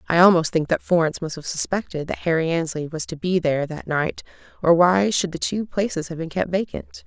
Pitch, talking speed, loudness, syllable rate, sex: 170 Hz, 230 wpm, -22 LUFS, 5.8 syllables/s, female